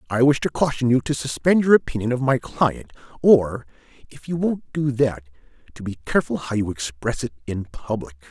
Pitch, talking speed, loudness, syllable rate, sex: 125 Hz, 195 wpm, -21 LUFS, 5.5 syllables/s, male